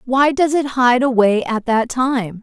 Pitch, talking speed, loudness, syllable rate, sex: 245 Hz, 200 wpm, -16 LUFS, 3.9 syllables/s, female